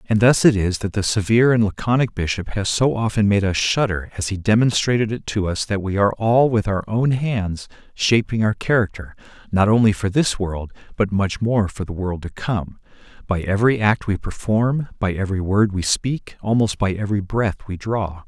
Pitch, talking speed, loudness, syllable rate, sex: 105 Hz, 205 wpm, -20 LUFS, 5.2 syllables/s, male